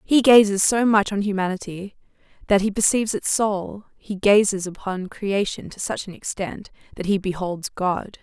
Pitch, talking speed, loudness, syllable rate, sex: 200 Hz, 170 wpm, -21 LUFS, 4.7 syllables/s, female